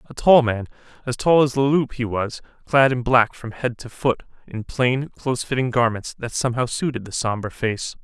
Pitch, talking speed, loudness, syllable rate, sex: 125 Hz, 210 wpm, -21 LUFS, 5.0 syllables/s, male